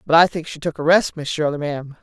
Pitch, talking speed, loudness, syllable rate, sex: 155 Hz, 295 wpm, -19 LUFS, 6.4 syllables/s, female